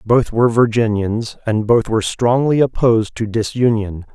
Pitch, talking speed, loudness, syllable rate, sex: 115 Hz, 145 wpm, -16 LUFS, 4.9 syllables/s, male